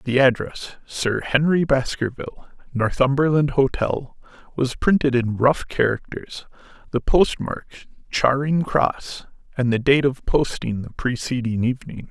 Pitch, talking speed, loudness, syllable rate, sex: 130 Hz, 125 wpm, -21 LUFS, 4.3 syllables/s, male